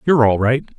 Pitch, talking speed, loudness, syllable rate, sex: 125 Hz, 230 wpm, -16 LUFS, 5.9 syllables/s, male